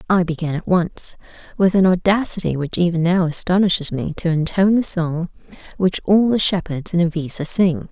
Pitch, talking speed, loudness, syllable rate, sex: 175 Hz, 175 wpm, -18 LUFS, 5.3 syllables/s, female